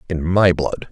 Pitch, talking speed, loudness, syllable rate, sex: 90 Hz, 200 wpm, -17 LUFS, 5.2 syllables/s, male